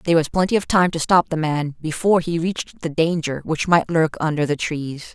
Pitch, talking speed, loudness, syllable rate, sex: 160 Hz, 235 wpm, -20 LUFS, 5.7 syllables/s, female